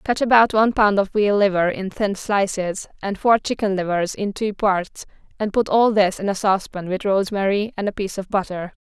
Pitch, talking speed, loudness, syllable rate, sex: 200 Hz, 210 wpm, -20 LUFS, 5.4 syllables/s, female